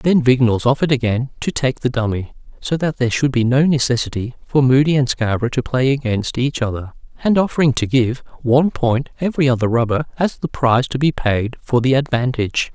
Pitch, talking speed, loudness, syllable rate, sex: 130 Hz, 200 wpm, -17 LUFS, 5.9 syllables/s, male